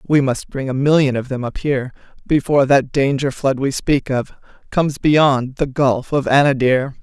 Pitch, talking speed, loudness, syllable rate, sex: 135 Hz, 190 wpm, -17 LUFS, 4.8 syllables/s, female